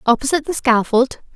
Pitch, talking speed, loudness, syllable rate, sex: 260 Hz, 135 wpm, -17 LUFS, 6.4 syllables/s, female